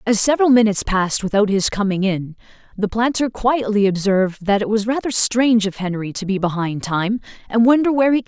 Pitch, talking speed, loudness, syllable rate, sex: 215 Hz, 210 wpm, -18 LUFS, 6.1 syllables/s, female